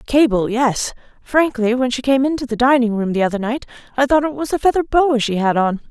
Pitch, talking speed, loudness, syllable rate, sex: 250 Hz, 225 wpm, -17 LUFS, 5.7 syllables/s, female